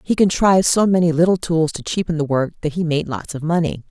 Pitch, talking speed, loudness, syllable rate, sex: 165 Hz, 245 wpm, -18 LUFS, 6.0 syllables/s, female